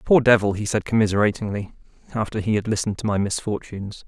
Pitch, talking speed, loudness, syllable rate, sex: 105 Hz, 175 wpm, -22 LUFS, 6.7 syllables/s, male